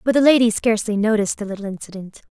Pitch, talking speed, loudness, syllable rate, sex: 215 Hz, 210 wpm, -19 LUFS, 7.5 syllables/s, female